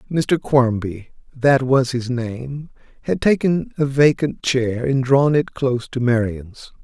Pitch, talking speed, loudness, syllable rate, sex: 130 Hz, 130 wpm, -19 LUFS, 3.8 syllables/s, male